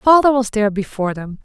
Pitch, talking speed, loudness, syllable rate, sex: 225 Hz, 210 wpm, -17 LUFS, 6.5 syllables/s, female